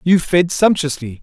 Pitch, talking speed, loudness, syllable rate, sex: 165 Hz, 145 wpm, -15 LUFS, 4.4 syllables/s, male